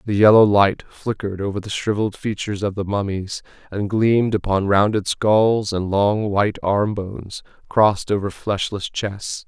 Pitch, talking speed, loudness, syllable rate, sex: 100 Hz, 150 wpm, -20 LUFS, 4.8 syllables/s, male